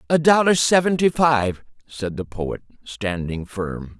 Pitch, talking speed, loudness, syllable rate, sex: 120 Hz, 135 wpm, -20 LUFS, 3.9 syllables/s, male